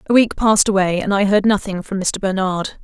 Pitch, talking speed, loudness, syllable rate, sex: 200 Hz, 235 wpm, -17 LUFS, 5.7 syllables/s, female